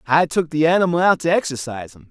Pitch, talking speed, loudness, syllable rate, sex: 160 Hz, 230 wpm, -18 LUFS, 6.6 syllables/s, male